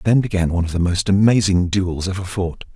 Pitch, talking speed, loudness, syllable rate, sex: 95 Hz, 220 wpm, -18 LUFS, 5.8 syllables/s, male